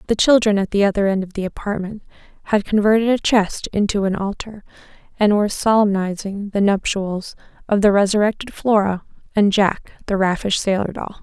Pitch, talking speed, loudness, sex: 205 Hz, 165 wpm, -18 LUFS, female